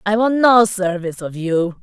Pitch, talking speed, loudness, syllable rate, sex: 200 Hz, 195 wpm, -16 LUFS, 4.7 syllables/s, female